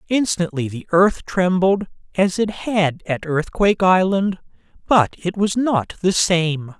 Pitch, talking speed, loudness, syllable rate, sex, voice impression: 185 Hz, 140 wpm, -19 LUFS, 3.9 syllables/s, male, masculine, adult-like, clear, slightly refreshing, slightly unique, slightly lively